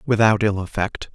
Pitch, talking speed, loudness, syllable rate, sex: 105 Hz, 155 wpm, -20 LUFS, 4.9 syllables/s, male